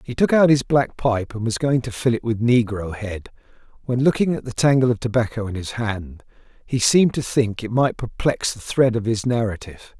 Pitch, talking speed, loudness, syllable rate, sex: 120 Hz, 220 wpm, -20 LUFS, 5.3 syllables/s, male